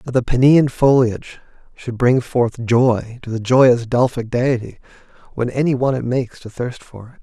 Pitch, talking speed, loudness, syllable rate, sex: 125 Hz, 185 wpm, -17 LUFS, 4.8 syllables/s, male